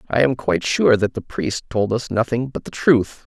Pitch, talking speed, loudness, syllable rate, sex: 120 Hz, 235 wpm, -20 LUFS, 5.0 syllables/s, male